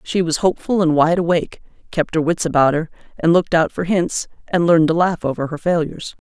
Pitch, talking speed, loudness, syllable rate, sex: 165 Hz, 220 wpm, -18 LUFS, 6.2 syllables/s, female